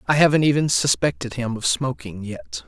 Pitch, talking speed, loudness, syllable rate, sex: 125 Hz, 180 wpm, -21 LUFS, 5.2 syllables/s, male